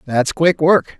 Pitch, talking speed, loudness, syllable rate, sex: 155 Hz, 180 wpm, -15 LUFS, 3.5 syllables/s, male